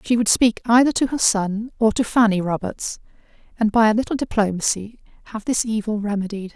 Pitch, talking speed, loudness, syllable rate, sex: 215 Hz, 185 wpm, -20 LUFS, 5.5 syllables/s, female